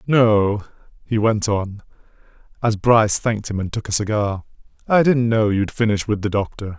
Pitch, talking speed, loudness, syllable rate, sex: 110 Hz, 175 wpm, -19 LUFS, 5.2 syllables/s, male